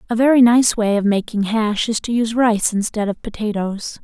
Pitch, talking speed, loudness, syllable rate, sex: 220 Hz, 210 wpm, -17 LUFS, 5.2 syllables/s, female